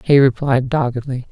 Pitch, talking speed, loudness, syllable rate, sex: 130 Hz, 135 wpm, -17 LUFS, 5.0 syllables/s, female